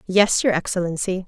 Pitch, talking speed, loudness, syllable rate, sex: 185 Hz, 140 wpm, -20 LUFS, 5.1 syllables/s, female